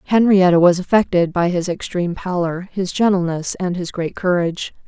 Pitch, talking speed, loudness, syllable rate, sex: 180 Hz, 160 wpm, -18 LUFS, 5.3 syllables/s, female